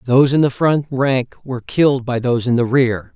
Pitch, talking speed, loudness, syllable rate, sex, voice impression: 130 Hz, 230 wpm, -16 LUFS, 5.5 syllables/s, male, very masculine, very adult-like, very thick, very tensed, very powerful, bright, hard, very clear, fluent, very cool, very intellectual, very refreshing, very sincere, calm, slightly mature, very friendly, very reassuring, unique, elegant, slightly wild, very sweet, lively, strict, slightly intense